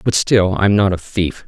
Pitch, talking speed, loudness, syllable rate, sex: 100 Hz, 245 wpm, -16 LUFS, 4.4 syllables/s, male